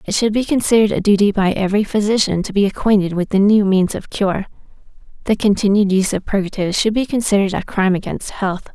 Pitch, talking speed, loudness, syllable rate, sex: 200 Hz, 205 wpm, -17 LUFS, 6.6 syllables/s, female